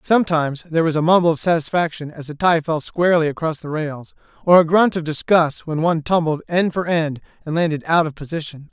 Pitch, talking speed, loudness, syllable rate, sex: 160 Hz, 215 wpm, -19 LUFS, 6.0 syllables/s, male